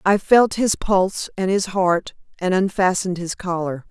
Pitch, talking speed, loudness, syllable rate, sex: 185 Hz, 170 wpm, -20 LUFS, 4.6 syllables/s, female